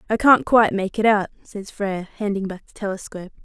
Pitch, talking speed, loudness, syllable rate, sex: 205 Hz, 210 wpm, -20 LUFS, 6.5 syllables/s, female